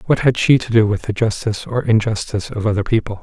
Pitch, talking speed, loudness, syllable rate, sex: 110 Hz, 240 wpm, -17 LUFS, 6.5 syllables/s, male